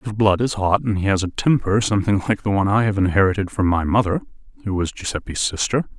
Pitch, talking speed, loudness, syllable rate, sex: 105 Hz, 230 wpm, -20 LUFS, 6.5 syllables/s, male